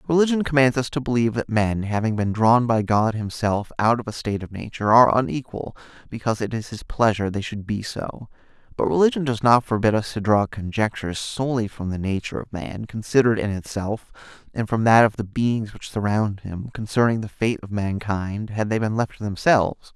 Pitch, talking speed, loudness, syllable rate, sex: 110 Hz, 205 wpm, -22 LUFS, 5.7 syllables/s, male